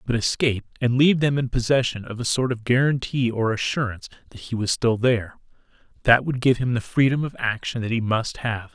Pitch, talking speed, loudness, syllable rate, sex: 120 Hz, 205 wpm, -22 LUFS, 5.9 syllables/s, male